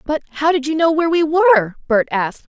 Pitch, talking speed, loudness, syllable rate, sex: 300 Hz, 235 wpm, -16 LUFS, 6.4 syllables/s, female